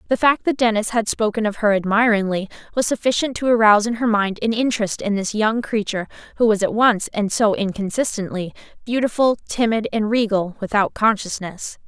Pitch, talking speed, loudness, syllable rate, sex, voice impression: 215 Hz, 175 wpm, -19 LUFS, 5.6 syllables/s, female, very feminine, young, very thin, tensed, slightly weak, bright, hard, very clear, fluent, cute, intellectual, very refreshing, sincere, calm, very friendly, very reassuring, unique, elegant, slightly wild, sweet, very lively, kind, slightly intense, slightly sharp